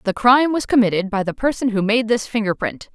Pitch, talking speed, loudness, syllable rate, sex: 225 Hz, 245 wpm, -18 LUFS, 6.1 syllables/s, female